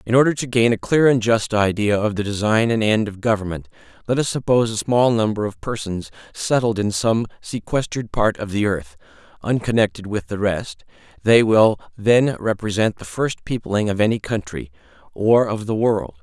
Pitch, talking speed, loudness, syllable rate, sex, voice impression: 110 Hz, 185 wpm, -20 LUFS, 5.1 syllables/s, male, very masculine, adult-like, slightly fluent, slightly cool, sincere, slightly unique